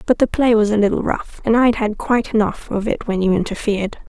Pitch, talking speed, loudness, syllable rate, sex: 215 Hz, 245 wpm, -18 LUFS, 5.9 syllables/s, female